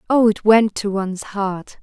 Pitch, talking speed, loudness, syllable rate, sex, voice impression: 205 Hz, 200 wpm, -18 LUFS, 4.4 syllables/s, female, feminine, adult-like, tensed, slightly powerful, slightly dark, slightly hard, clear, calm, elegant, sharp